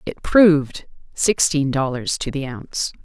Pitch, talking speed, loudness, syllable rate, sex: 150 Hz, 140 wpm, -19 LUFS, 4.4 syllables/s, female